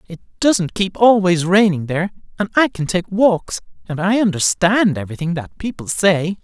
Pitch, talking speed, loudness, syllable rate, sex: 185 Hz, 170 wpm, -17 LUFS, 4.9 syllables/s, male